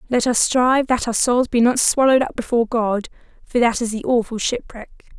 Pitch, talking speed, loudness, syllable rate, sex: 240 Hz, 210 wpm, -18 LUFS, 5.9 syllables/s, female